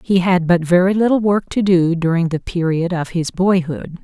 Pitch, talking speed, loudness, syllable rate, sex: 175 Hz, 210 wpm, -16 LUFS, 4.9 syllables/s, female